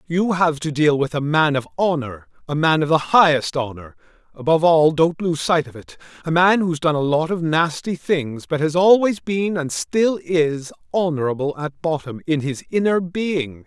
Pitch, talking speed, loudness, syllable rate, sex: 160 Hz, 190 wpm, -19 LUFS, 4.7 syllables/s, male